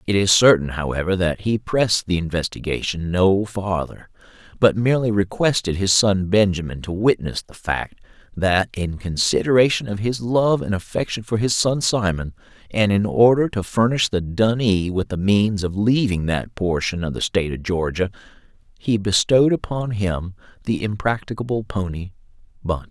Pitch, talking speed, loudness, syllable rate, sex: 100 Hz, 155 wpm, -20 LUFS, 4.9 syllables/s, male